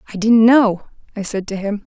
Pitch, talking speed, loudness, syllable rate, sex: 210 Hz, 215 wpm, -16 LUFS, 5.4 syllables/s, female